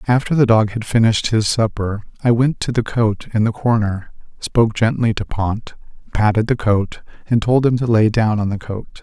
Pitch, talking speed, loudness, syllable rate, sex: 110 Hz, 205 wpm, -17 LUFS, 5.0 syllables/s, male